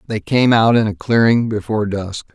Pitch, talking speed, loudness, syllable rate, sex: 110 Hz, 205 wpm, -16 LUFS, 5.2 syllables/s, male